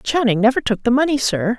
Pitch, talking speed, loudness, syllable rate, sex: 240 Hz, 225 wpm, -17 LUFS, 5.8 syllables/s, female